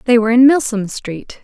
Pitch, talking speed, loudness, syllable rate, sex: 235 Hz, 210 wpm, -13 LUFS, 5.4 syllables/s, female